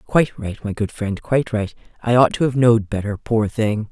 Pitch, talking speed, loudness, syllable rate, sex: 110 Hz, 230 wpm, -20 LUFS, 5.4 syllables/s, female